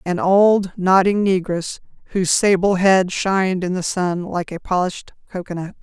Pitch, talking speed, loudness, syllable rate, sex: 185 Hz, 155 wpm, -18 LUFS, 4.7 syllables/s, female